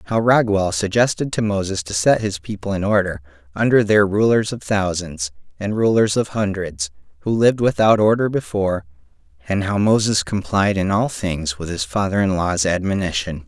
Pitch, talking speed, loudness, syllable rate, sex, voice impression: 100 Hz, 170 wpm, -19 LUFS, 5.1 syllables/s, male, masculine, very adult-like, slightly fluent, calm, reassuring, kind